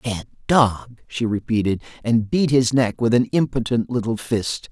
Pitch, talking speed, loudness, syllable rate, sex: 115 Hz, 165 wpm, -20 LUFS, 4.8 syllables/s, male